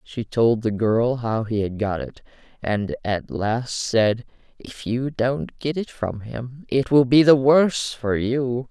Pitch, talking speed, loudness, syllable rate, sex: 120 Hz, 185 wpm, -21 LUFS, 3.6 syllables/s, male